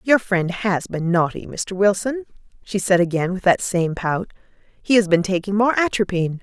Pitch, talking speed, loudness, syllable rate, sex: 195 Hz, 185 wpm, -20 LUFS, 4.9 syllables/s, female